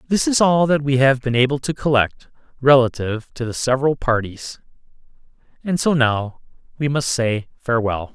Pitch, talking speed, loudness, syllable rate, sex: 130 Hz, 160 wpm, -19 LUFS, 5.1 syllables/s, male